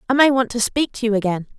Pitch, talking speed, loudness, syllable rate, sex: 240 Hz, 305 wpm, -19 LUFS, 6.8 syllables/s, female